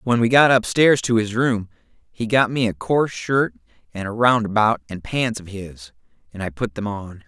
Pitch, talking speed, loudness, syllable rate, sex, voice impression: 110 Hz, 215 wpm, -20 LUFS, 4.9 syllables/s, male, very masculine, slightly thick, slightly tensed, slightly cool, slightly intellectual, slightly calm, slightly friendly, slightly wild, lively